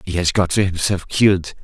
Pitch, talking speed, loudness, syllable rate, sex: 95 Hz, 185 wpm, -18 LUFS, 4.8 syllables/s, male